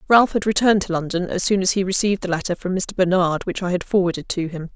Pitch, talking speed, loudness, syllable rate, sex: 185 Hz, 265 wpm, -20 LUFS, 6.6 syllables/s, female